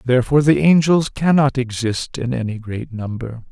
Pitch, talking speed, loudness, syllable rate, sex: 125 Hz, 155 wpm, -18 LUFS, 5.0 syllables/s, male